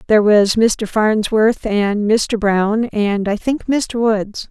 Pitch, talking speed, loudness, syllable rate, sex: 215 Hz, 160 wpm, -16 LUFS, 3.3 syllables/s, female